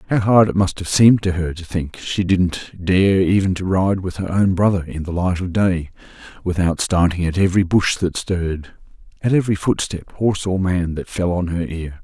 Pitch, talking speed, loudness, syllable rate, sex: 90 Hz, 210 wpm, -19 LUFS, 5.1 syllables/s, male